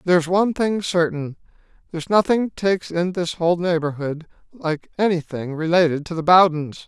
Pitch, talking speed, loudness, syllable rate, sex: 170 Hz, 150 wpm, -20 LUFS, 5.3 syllables/s, male